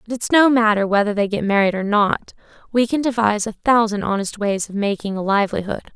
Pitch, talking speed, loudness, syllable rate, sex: 215 Hz, 210 wpm, -19 LUFS, 6.0 syllables/s, female